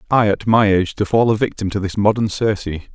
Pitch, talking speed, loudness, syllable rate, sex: 105 Hz, 245 wpm, -17 LUFS, 6.4 syllables/s, male